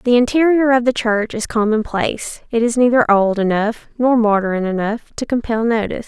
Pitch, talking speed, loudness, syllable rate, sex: 230 Hz, 180 wpm, -16 LUFS, 5.1 syllables/s, female